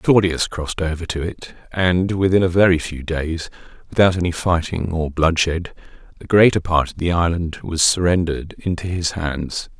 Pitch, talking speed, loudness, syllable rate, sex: 85 Hz, 165 wpm, -19 LUFS, 4.9 syllables/s, male